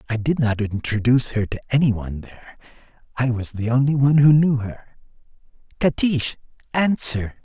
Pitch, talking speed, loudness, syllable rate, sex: 125 Hz, 155 wpm, -20 LUFS, 5.6 syllables/s, male